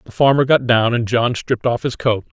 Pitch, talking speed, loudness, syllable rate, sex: 120 Hz, 250 wpm, -17 LUFS, 5.6 syllables/s, male